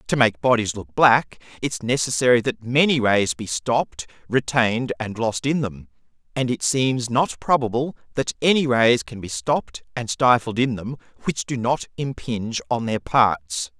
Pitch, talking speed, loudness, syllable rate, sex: 120 Hz, 170 wpm, -21 LUFS, 4.4 syllables/s, male